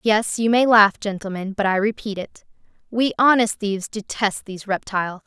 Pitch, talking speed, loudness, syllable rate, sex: 210 Hz, 170 wpm, -20 LUFS, 5.2 syllables/s, female